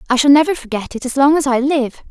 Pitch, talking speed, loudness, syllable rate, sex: 270 Hz, 285 wpm, -15 LUFS, 6.5 syllables/s, female